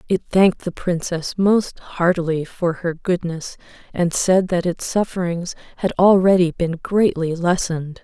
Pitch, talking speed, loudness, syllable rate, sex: 175 Hz, 140 wpm, -19 LUFS, 4.3 syllables/s, female